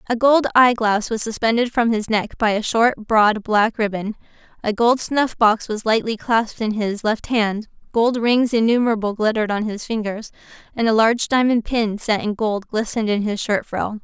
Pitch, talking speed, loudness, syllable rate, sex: 220 Hz, 195 wpm, -19 LUFS, 4.9 syllables/s, female